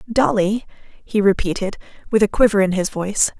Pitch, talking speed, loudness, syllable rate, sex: 200 Hz, 160 wpm, -19 LUFS, 5.2 syllables/s, female